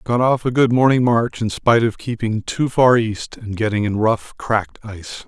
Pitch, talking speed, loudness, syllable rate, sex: 115 Hz, 215 wpm, -18 LUFS, 5.0 syllables/s, male